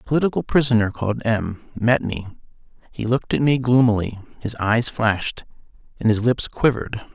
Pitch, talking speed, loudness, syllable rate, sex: 115 Hz, 160 wpm, -21 LUFS, 5.7 syllables/s, male